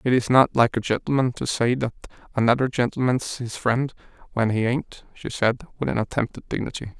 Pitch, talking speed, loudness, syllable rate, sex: 120 Hz, 195 wpm, -23 LUFS, 5.5 syllables/s, male